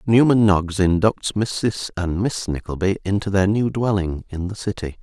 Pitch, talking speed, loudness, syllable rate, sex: 100 Hz, 165 wpm, -20 LUFS, 4.5 syllables/s, male